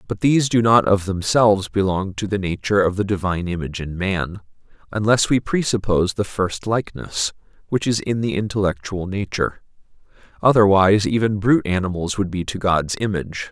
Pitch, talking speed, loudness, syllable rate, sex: 100 Hz, 165 wpm, -20 LUFS, 5.7 syllables/s, male